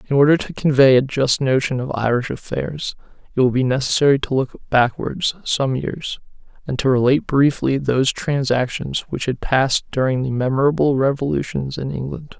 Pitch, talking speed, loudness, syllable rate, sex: 135 Hz, 165 wpm, -19 LUFS, 5.3 syllables/s, male